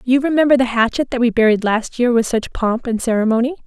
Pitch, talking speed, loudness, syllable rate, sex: 240 Hz, 230 wpm, -16 LUFS, 6.0 syllables/s, female